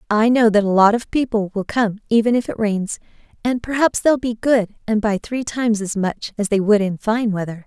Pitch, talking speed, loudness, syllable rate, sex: 220 Hz, 235 wpm, -19 LUFS, 5.2 syllables/s, female